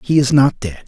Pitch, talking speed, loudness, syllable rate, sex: 135 Hz, 275 wpm, -14 LUFS, 5.2 syllables/s, male